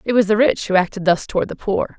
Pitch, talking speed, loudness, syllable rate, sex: 200 Hz, 300 wpm, -18 LUFS, 6.4 syllables/s, female